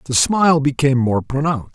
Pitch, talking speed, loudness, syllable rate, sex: 140 Hz, 170 wpm, -17 LUFS, 6.3 syllables/s, male